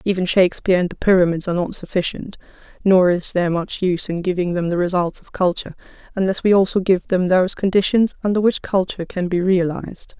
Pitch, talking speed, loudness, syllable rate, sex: 185 Hz, 195 wpm, -19 LUFS, 6.3 syllables/s, female